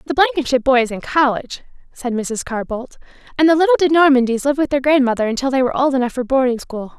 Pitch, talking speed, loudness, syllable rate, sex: 270 Hz, 230 wpm, -17 LUFS, 6.7 syllables/s, female